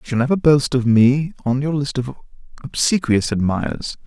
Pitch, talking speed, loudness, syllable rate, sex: 135 Hz, 175 wpm, -18 LUFS, 5.3 syllables/s, male